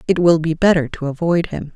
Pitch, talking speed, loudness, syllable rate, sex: 165 Hz, 240 wpm, -17 LUFS, 5.7 syllables/s, female